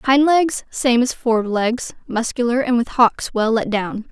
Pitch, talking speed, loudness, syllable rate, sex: 240 Hz, 175 wpm, -18 LUFS, 3.9 syllables/s, female